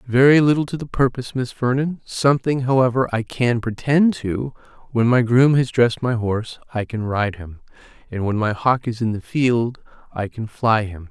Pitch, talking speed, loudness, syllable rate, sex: 120 Hz, 190 wpm, -20 LUFS, 5.0 syllables/s, male